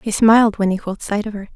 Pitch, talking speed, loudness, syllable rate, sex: 210 Hz, 310 wpm, -17 LUFS, 6.1 syllables/s, female